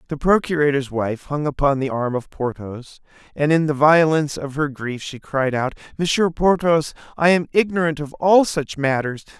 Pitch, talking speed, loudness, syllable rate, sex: 150 Hz, 180 wpm, -20 LUFS, 4.9 syllables/s, male